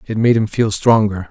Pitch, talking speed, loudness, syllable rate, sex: 105 Hz, 230 wpm, -15 LUFS, 5.1 syllables/s, male